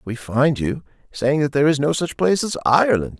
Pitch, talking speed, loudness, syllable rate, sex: 140 Hz, 225 wpm, -19 LUFS, 5.8 syllables/s, male